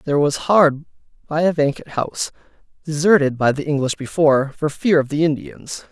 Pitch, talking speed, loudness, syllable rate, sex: 150 Hz, 175 wpm, -18 LUFS, 2.7 syllables/s, male